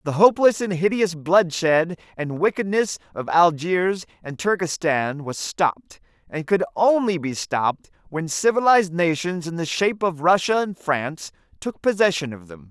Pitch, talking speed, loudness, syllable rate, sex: 170 Hz, 150 wpm, -21 LUFS, 4.7 syllables/s, male